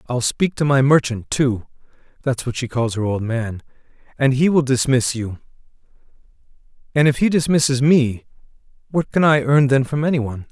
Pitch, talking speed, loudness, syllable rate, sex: 130 Hz, 175 wpm, -18 LUFS, 4.3 syllables/s, male